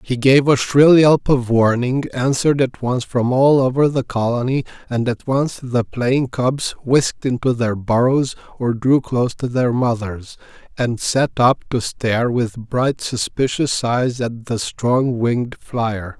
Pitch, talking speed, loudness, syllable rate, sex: 125 Hz, 165 wpm, -18 LUFS, 4.0 syllables/s, male